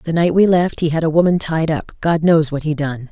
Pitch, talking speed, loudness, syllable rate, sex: 160 Hz, 270 wpm, -16 LUFS, 5.5 syllables/s, female